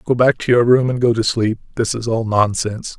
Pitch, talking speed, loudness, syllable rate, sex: 115 Hz, 260 wpm, -17 LUFS, 5.5 syllables/s, male